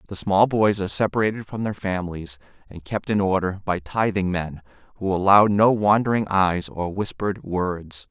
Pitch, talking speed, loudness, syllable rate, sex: 95 Hz, 170 wpm, -22 LUFS, 5.0 syllables/s, male